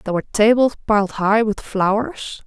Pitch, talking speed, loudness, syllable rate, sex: 215 Hz, 170 wpm, -18 LUFS, 5.2 syllables/s, female